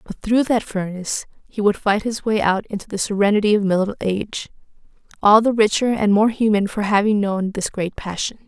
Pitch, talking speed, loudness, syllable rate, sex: 210 Hz, 190 wpm, -19 LUFS, 5.5 syllables/s, female